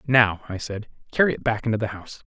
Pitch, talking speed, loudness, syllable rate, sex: 110 Hz, 235 wpm, -23 LUFS, 6.3 syllables/s, male